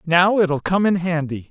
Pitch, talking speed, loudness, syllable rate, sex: 170 Hz, 200 wpm, -18 LUFS, 4.3 syllables/s, male